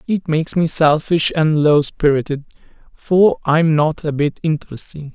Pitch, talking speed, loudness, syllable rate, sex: 155 Hz, 150 wpm, -16 LUFS, 4.5 syllables/s, male